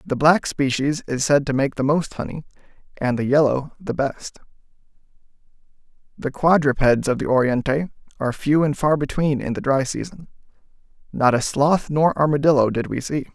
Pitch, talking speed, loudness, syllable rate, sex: 140 Hz, 165 wpm, -20 LUFS, 5.1 syllables/s, male